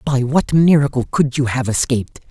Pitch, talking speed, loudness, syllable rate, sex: 135 Hz, 180 wpm, -16 LUFS, 5.2 syllables/s, male